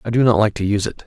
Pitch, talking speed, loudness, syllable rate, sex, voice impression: 110 Hz, 395 wpm, -18 LUFS, 8.3 syllables/s, male, very masculine, adult-like, slightly thick, slightly relaxed, powerful, bright, slightly soft, clear, fluent, slightly raspy, cool, very intellectual, refreshing, very sincere, calm, slightly mature, very friendly, very reassuring, slightly unique, elegant, slightly wild, sweet, lively, kind, slightly intense, modest